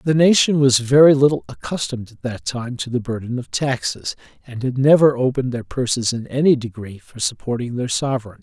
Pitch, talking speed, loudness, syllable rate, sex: 125 Hz, 190 wpm, -19 LUFS, 5.6 syllables/s, male